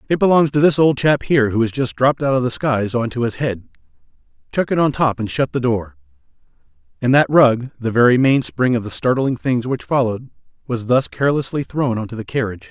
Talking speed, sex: 240 wpm, male